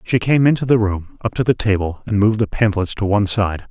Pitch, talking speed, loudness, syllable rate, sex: 105 Hz, 260 wpm, -18 LUFS, 6.0 syllables/s, male